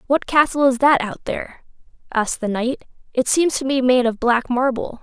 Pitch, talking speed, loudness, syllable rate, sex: 255 Hz, 205 wpm, -19 LUFS, 5.2 syllables/s, female